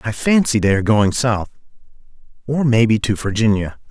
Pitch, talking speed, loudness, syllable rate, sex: 115 Hz, 155 wpm, -17 LUFS, 5.4 syllables/s, male